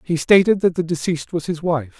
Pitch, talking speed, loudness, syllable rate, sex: 170 Hz, 240 wpm, -18 LUFS, 5.8 syllables/s, male